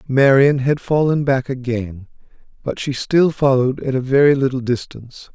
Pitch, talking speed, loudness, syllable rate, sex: 135 Hz, 155 wpm, -17 LUFS, 5.0 syllables/s, male